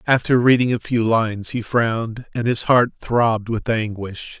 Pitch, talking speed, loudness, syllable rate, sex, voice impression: 115 Hz, 175 wpm, -19 LUFS, 4.6 syllables/s, male, masculine, adult-like, clear, sincere, slightly friendly